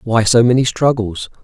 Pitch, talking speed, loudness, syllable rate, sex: 120 Hz, 165 wpm, -14 LUFS, 4.7 syllables/s, male